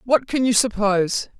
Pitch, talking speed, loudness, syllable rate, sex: 225 Hz, 170 wpm, -19 LUFS, 5.0 syllables/s, female